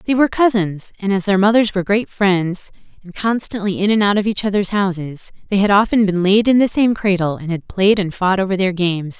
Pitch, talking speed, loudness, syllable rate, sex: 195 Hz, 235 wpm, -16 LUFS, 5.6 syllables/s, female